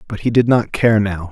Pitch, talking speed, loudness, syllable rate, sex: 110 Hz, 275 wpm, -15 LUFS, 5.2 syllables/s, male